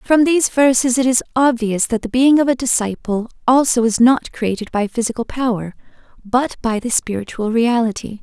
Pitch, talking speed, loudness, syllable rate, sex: 240 Hz, 175 wpm, -17 LUFS, 5.1 syllables/s, female